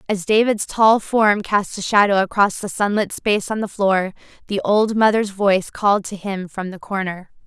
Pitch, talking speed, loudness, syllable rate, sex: 200 Hz, 195 wpm, -18 LUFS, 4.9 syllables/s, female